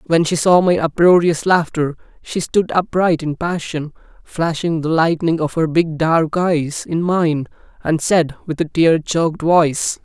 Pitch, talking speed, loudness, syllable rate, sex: 165 Hz, 165 wpm, -17 LUFS, 4.2 syllables/s, male